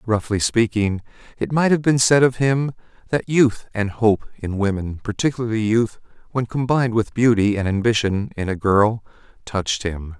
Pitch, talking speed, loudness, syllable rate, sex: 110 Hz, 155 wpm, -20 LUFS, 4.9 syllables/s, male